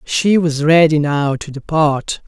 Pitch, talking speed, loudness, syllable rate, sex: 155 Hz, 160 wpm, -15 LUFS, 3.7 syllables/s, male